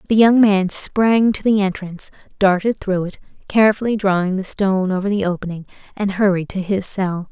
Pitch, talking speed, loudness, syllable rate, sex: 195 Hz, 180 wpm, -18 LUFS, 5.4 syllables/s, female